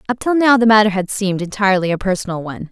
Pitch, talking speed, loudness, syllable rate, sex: 200 Hz, 245 wpm, -16 LUFS, 7.5 syllables/s, female